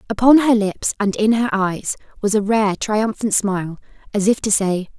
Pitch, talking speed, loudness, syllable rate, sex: 210 Hz, 195 wpm, -18 LUFS, 4.7 syllables/s, female